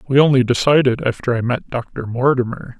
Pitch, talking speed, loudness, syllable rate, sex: 125 Hz, 170 wpm, -17 LUFS, 5.3 syllables/s, male